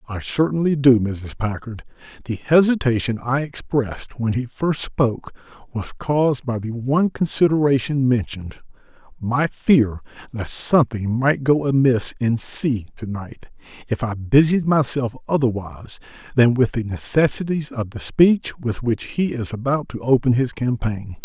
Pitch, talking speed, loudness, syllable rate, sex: 125 Hz, 145 wpm, -20 LUFS, 4.6 syllables/s, male